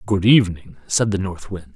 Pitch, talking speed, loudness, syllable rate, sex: 95 Hz, 205 wpm, -18 LUFS, 5.2 syllables/s, male